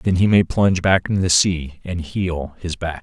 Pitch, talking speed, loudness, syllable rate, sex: 90 Hz, 240 wpm, -19 LUFS, 4.9 syllables/s, male